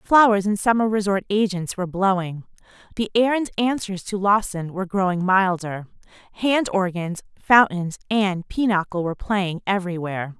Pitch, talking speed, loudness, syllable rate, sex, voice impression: 195 Hz, 140 wpm, -21 LUFS, 5.1 syllables/s, female, feminine, adult-like, tensed, powerful, clear, intellectual, slightly friendly, slightly unique, lively, sharp